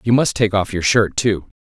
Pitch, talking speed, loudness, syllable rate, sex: 100 Hz, 260 wpm, -17 LUFS, 5.0 syllables/s, male